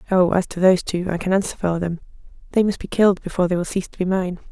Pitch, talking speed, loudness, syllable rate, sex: 185 Hz, 280 wpm, -20 LUFS, 7.5 syllables/s, female